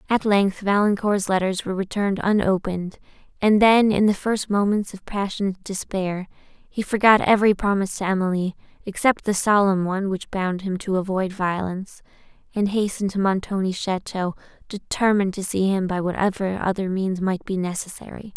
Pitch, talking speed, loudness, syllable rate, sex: 195 Hz, 155 wpm, -22 LUFS, 5.4 syllables/s, female